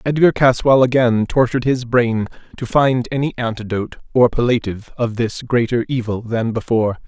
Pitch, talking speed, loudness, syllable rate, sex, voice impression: 120 Hz, 155 wpm, -17 LUFS, 5.3 syllables/s, male, masculine, adult-like, middle-aged, thick, tensed, slightly powerful, slightly bright, slightly hard, clear, slightly fluent, cool, slightly intellectual, sincere, very calm, mature, slightly friendly, reassuring, slightly unique, slightly wild, slightly lively, kind, modest